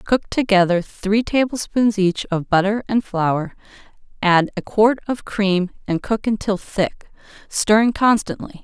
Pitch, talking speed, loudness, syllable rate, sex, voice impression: 205 Hz, 140 wpm, -19 LUFS, 4.2 syllables/s, female, feminine, adult-like, slightly cool, slightly intellectual, calm